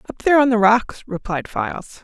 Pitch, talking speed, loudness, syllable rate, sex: 230 Hz, 205 wpm, -18 LUFS, 5.6 syllables/s, female